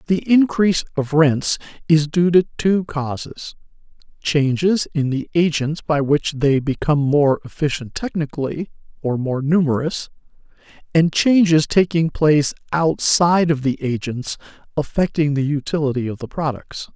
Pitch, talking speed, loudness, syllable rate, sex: 150 Hz, 130 wpm, -19 LUFS, 4.6 syllables/s, male